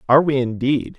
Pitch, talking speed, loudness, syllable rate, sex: 135 Hz, 185 wpm, -19 LUFS, 6.0 syllables/s, male